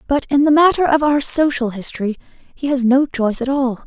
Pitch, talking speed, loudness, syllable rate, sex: 270 Hz, 215 wpm, -16 LUFS, 5.5 syllables/s, female